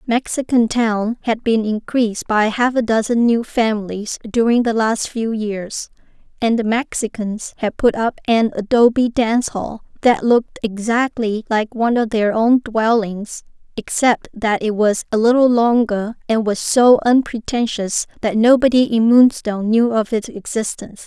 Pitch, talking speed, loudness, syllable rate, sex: 225 Hz, 155 wpm, -17 LUFS, 4.4 syllables/s, female